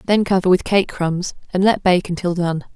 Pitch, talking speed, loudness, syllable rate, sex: 185 Hz, 220 wpm, -18 LUFS, 4.9 syllables/s, female